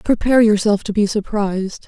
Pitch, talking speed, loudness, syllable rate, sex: 210 Hz, 160 wpm, -17 LUFS, 5.7 syllables/s, female